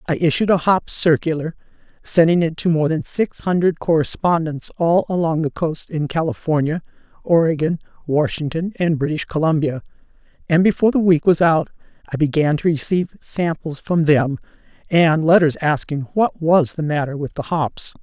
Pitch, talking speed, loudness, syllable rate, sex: 160 Hz, 155 wpm, -18 LUFS, 5.1 syllables/s, female